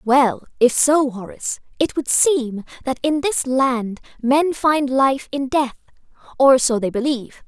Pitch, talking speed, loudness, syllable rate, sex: 265 Hz, 160 wpm, -19 LUFS, 4.0 syllables/s, female